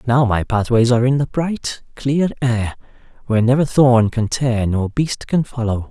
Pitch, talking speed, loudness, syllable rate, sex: 125 Hz, 195 wpm, -17 LUFS, 4.8 syllables/s, male